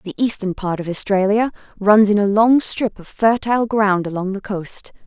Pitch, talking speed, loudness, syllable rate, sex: 205 Hz, 190 wpm, -18 LUFS, 4.8 syllables/s, female